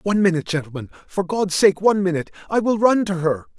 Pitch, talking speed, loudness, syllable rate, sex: 185 Hz, 220 wpm, -20 LUFS, 6.9 syllables/s, male